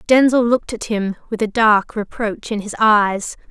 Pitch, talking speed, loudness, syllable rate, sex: 220 Hz, 190 wpm, -17 LUFS, 4.5 syllables/s, female